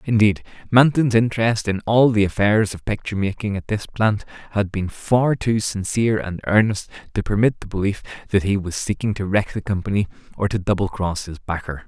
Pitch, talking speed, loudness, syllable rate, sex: 105 Hz, 190 wpm, -21 LUFS, 5.5 syllables/s, male